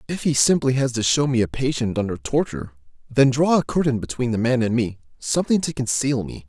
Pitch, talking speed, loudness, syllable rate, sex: 125 Hz, 220 wpm, -21 LUFS, 5.9 syllables/s, male